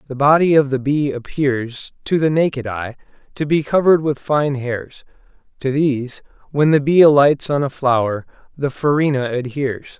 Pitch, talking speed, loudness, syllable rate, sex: 140 Hz, 170 wpm, -17 LUFS, 4.9 syllables/s, male